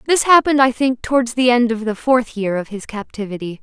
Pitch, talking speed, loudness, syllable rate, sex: 240 Hz, 230 wpm, -17 LUFS, 5.8 syllables/s, female